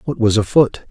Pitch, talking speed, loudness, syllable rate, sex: 115 Hz, 200 wpm, -15 LUFS, 5.1 syllables/s, male